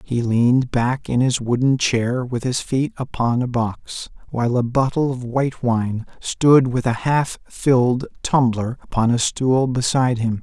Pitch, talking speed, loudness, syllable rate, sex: 125 Hz, 175 wpm, -19 LUFS, 4.2 syllables/s, male